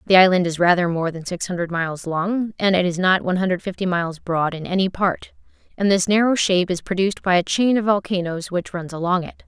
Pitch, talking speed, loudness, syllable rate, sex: 185 Hz, 235 wpm, -20 LUFS, 6.0 syllables/s, female